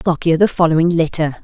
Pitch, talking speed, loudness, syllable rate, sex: 165 Hz, 170 wpm, -15 LUFS, 6.1 syllables/s, female